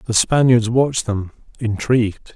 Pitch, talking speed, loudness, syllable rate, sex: 115 Hz, 125 wpm, -18 LUFS, 4.7 syllables/s, male